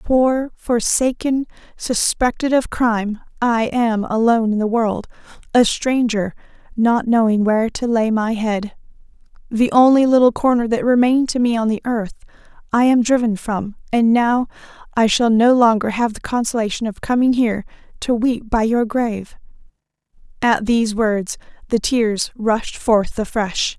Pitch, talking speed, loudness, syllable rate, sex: 230 Hz, 150 wpm, -17 LUFS, 4.6 syllables/s, female